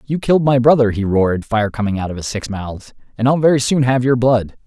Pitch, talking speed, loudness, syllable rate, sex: 120 Hz, 255 wpm, -16 LUFS, 5.9 syllables/s, male